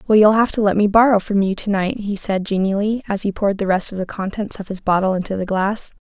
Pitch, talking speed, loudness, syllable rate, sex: 200 Hz, 280 wpm, -18 LUFS, 6.1 syllables/s, female